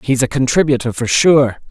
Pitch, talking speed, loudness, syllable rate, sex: 130 Hz, 175 wpm, -14 LUFS, 5.2 syllables/s, male